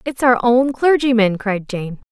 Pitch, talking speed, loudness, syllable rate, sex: 235 Hz, 170 wpm, -16 LUFS, 4.2 syllables/s, female